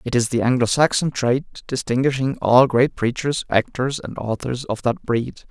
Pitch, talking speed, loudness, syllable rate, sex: 125 Hz, 175 wpm, -20 LUFS, 4.7 syllables/s, male